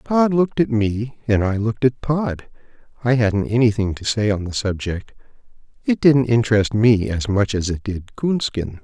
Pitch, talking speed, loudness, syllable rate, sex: 115 Hz, 185 wpm, -19 LUFS, 4.7 syllables/s, male